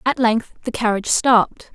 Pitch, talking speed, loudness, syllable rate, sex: 230 Hz, 170 wpm, -18 LUFS, 5.3 syllables/s, female